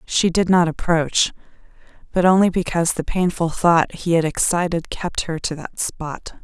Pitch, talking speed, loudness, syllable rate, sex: 170 Hz, 170 wpm, -19 LUFS, 4.6 syllables/s, female